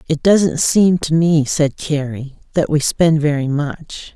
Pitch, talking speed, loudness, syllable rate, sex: 155 Hz, 175 wpm, -16 LUFS, 3.7 syllables/s, female